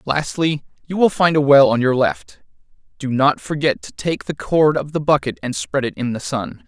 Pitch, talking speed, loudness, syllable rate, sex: 145 Hz, 225 wpm, -18 LUFS, 4.8 syllables/s, male